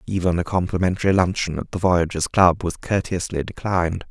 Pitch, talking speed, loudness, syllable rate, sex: 90 Hz, 160 wpm, -21 LUFS, 5.6 syllables/s, male